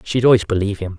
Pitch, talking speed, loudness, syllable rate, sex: 100 Hz, 245 wpm, -17 LUFS, 7.9 syllables/s, male